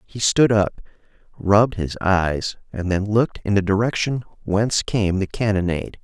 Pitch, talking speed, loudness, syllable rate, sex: 100 Hz, 160 wpm, -20 LUFS, 4.8 syllables/s, male